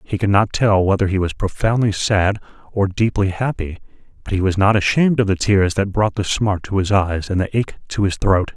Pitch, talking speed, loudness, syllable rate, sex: 100 Hz, 230 wpm, -18 LUFS, 5.3 syllables/s, male